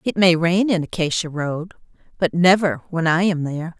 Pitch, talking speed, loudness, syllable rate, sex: 170 Hz, 190 wpm, -19 LUFS, 5.0 syllables/s, female